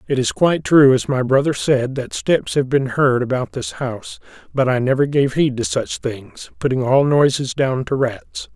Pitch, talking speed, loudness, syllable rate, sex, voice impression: 130 Hz, 210 wpm, -18 LUFS, 4.7 syllables/s, male, masculine, slightly old, slightly muffled, slightly raspy, slightly calm, slightly mature